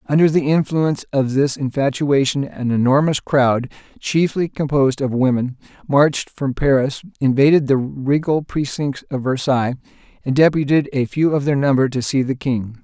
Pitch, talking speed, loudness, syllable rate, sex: 140 Hz, 155 wpm, -18 LUFS, 4.9 syllables/s, male